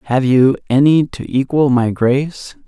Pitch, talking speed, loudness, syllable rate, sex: 135 Hz, 155 wpm, -14 LUFS, 4.4 syllables/s, male